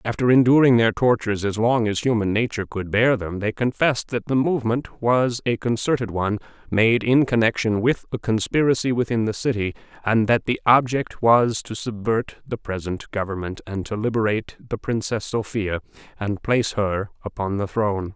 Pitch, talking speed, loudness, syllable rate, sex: 110 Hz, 170 wpm, -22 LUFS, 5.3 syllables/s, male